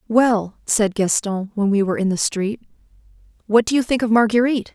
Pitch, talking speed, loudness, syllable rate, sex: 220 Hz, 190 wpm, -19 LUFS, 5.4 syllables/s, female